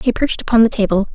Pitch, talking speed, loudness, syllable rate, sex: 220 Hz, 265 wpm, -16 LUFS, 7.5 syllables/s, female